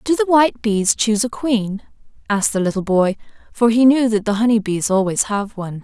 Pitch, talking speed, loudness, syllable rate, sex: 220 Hz, 215 wpm, -17 LUFS, 5.7 syllables/s, female